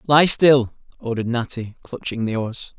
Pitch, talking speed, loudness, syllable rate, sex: 125 Hz, 150 wpm, -20 LUFS, 4.6 syllables/s, male